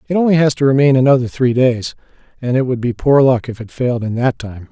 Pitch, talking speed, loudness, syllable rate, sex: 130 Hz, 255 wpm, -15 LUFS, 6.1 syllables/s, male